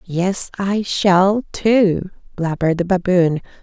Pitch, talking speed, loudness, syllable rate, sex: 185 Hz, 115 wpm, -17 LUFS, 3.4 syllables/s, female